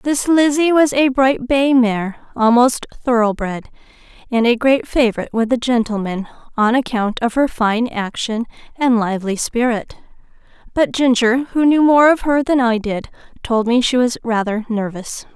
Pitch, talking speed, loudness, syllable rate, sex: 240 Hz, 160 wpm, -16 LUFS, 4.6 syllables/s, female